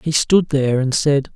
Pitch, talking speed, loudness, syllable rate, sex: 145 Hz, 220 wpm, -17 LUFS, 5.0 syllables/s, male